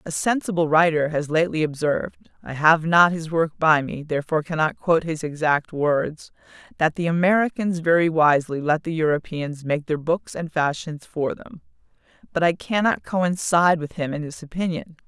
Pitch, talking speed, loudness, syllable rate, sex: 160 Hz, 170 wpm, -22 LUFS, 4.1 syllables/s, female